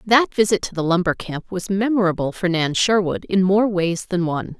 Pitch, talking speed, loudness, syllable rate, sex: 190 Hz, 210 wpm, -20 LUFS, 5.1 syllables/s, female